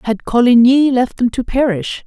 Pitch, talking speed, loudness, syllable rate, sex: 240 Hz, 175 wpm, -13 LUFS, 4.7 syllables/s, female